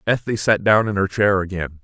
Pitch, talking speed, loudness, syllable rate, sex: 100 Hz, 230 wpm, -18 LUFS, 5.7 syllables/s, male